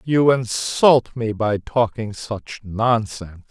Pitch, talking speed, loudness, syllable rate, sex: 115 Hz, 120 wpm, -19 LUFS, 3.3 syllables/s, male